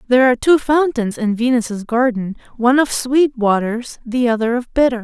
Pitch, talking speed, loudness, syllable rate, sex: 245 Hz, 180 wpm, -16 LUFS, 5.3 syllables/s, female